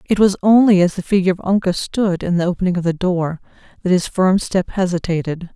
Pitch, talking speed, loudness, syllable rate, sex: 185 Hz, 215 wpm, -17 LUFS, 5.9 syllables/s, female